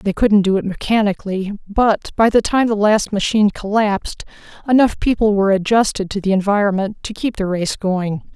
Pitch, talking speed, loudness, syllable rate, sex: 205 Hz, 180 wpm, -17 LUFS, 5.4 syllables/s, female